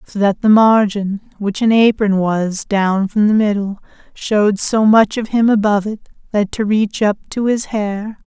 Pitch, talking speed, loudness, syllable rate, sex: 210 Hz, 190 wpm, -15 LUFS, 4.5 syllables/s, female